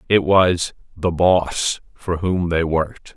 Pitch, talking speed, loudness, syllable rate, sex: 85 Hz, 150 wpm, -19 LUFS, 3.5 syllables/s, male